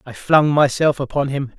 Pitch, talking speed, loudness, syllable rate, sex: 140 Hz, 190 wpm, -17 LUFS, 4.8 syllables/s, male